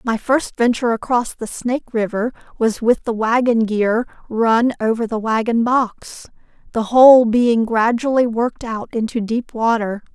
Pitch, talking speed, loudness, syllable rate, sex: 230 Hz, 155 wpm, -17 LUFS, 4.5 syllables/s, female